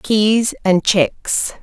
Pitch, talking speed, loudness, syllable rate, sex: 205 Hz, 110 wpm, -16 LUFS, 2.8 syllables/s, female